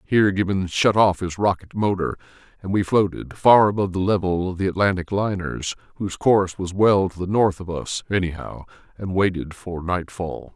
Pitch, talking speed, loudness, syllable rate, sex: 95 Hz, 180 wpm, -21 LUFS, 5.3 syllables/s, male